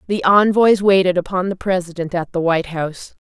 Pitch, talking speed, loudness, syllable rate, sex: 185 Hz, 185 wpm, -17 LUFS, 5.7 syllables/s, female